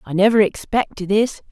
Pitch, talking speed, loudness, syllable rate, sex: 205 Hz, 160 wpm, -18 LUFS, 5.3 syllables/s, female